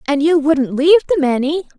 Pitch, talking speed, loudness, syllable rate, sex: 305 Hz, 200 wpm, -14 LUFS, 5.9 syllables/s, female